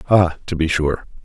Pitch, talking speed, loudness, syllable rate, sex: 85 Hz, 195 wpm, -19 LUFS, 4.8 syllables/s, male